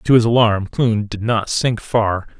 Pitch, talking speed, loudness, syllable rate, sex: 110 Hz, 200 wpm, -17 LUFS, 4.0 syllables/s, male